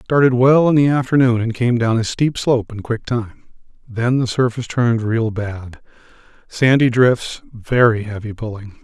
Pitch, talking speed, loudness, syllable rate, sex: 120 Hz, 155 wpm, -17 LUFS, 4.8 syllables/s, male